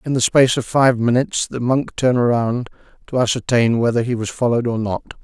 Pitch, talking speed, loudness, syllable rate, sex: 120 Hz, 205 wpm, -18 LUFS, 6.1 syllables/s, male